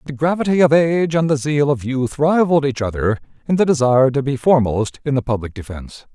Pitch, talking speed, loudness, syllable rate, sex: 140 Hz, 215 wpm, -17 LUFS, 6.2 syllables/s, male